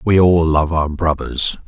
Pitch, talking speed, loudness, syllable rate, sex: 85 Hz, 180 wpm, -16 LUFS, 4.0 syllables/s, male